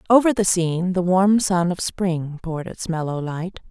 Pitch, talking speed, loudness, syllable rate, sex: 180 Hz, 195 wpm, -21 LUFS, 4.7 syllables/s, female